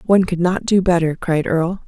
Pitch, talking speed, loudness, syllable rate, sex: 175 Hz, 225 wpm, -17 LUFS, 6.0 syllables/s, female